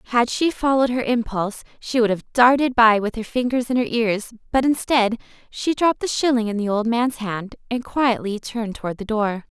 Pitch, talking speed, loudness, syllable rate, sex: 235 Hz, 205 wpm, -21 LUFS, 5.4 syllables/s, female